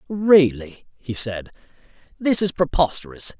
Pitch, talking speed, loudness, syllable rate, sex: 145 Hz, 105 wpm, -20 LUFS, 4.2 syllables/s, male